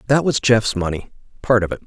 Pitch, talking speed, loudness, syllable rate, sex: 110 Hz, 195 wpm, -18 LUFS, 5.9 syllables/s, male